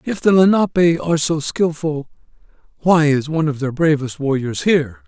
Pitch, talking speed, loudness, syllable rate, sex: 150 Hz, 165 wpm, -17 LUFS, 5.4 syllables/s, male